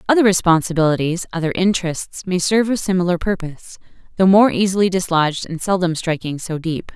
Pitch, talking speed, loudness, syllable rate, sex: 180 Hz, 155 wpm, -18 LUFS, 6.0 syllables/s, female